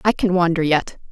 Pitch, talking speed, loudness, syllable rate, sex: 175 Hz, 215 wpm, -18 LUFS, 5.4 syllables/s, female